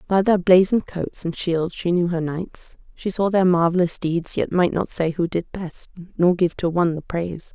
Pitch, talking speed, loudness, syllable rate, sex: 175 Hz, 225 wpm, -21 LUFS, 4.9 syllables/s, female